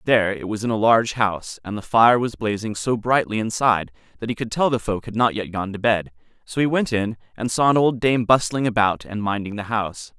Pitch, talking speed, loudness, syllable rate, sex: 110 Hz, 245 wpm, -21 LUFS, 5.8 syllables/s, male